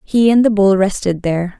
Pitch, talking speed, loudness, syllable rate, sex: 200 Hz, 225 wpm, -14 LUFS, 5.4 syllables/s, female